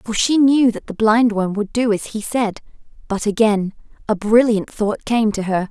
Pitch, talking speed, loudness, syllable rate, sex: 220 Hz, 200 wpm, -18 LUFS, 4.6 syllables/s, female